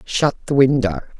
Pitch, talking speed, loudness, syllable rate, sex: 125 Hz, 150 wpm, -18 LUFS, 4.9 syllables/s, female